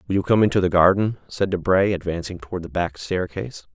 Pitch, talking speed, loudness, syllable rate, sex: 90 Hz, 210 wpm, -21 LUFS, 6.1 syllables/s, male